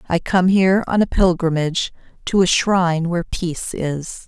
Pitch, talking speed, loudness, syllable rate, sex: 175 Hz, 170 wpm, -18 LUFS, 5.2 syllables/s, female